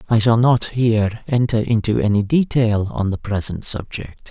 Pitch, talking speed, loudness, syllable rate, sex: 110 Hz, 165 wpm, -18 LUFS, 4.7 syllables/s, male